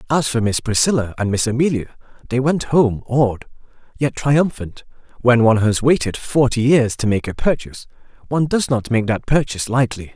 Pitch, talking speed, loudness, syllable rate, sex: 125 Hz, 175 wpm, -18 LUFS, 5.4 syllables/s, male